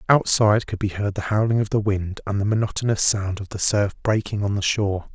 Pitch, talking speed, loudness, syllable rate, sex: 105 Hz, 235 wpm, -21 LUFS, 5.9 syllables/s, male